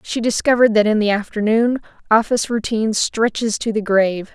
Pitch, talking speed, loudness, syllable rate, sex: 220 Hz, 165 wpm, -17 LUFS, 5.8 syllables/s, female